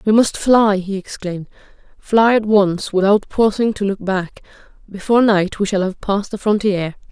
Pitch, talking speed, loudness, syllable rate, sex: 200 Hz, 175 wpm, -17 LUFS, 4.9 syllables/s, female